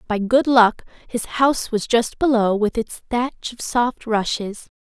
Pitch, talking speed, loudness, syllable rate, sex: 230 Hz, 175 wpm, -20 LUFS, 4.1 syllables/s, female